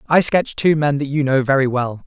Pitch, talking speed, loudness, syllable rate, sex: 140 Hz, 260 wpm, -17 LUFS, 5.1 syllables/s, male